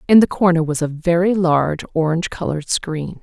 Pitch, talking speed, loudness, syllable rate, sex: 165 Hz, 185 wpm, -18 LUFS, 5.7 syllables/s, female